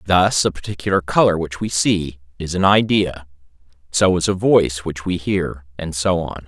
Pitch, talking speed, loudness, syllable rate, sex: 85 Hz, 185 wpm, -18 LUFS, 4.8 syllables/s, male